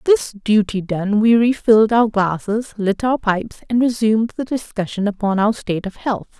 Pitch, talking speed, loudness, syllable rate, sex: 215 Hz, 180 wpm, -18 LUFS, 5.1 syllables/s, female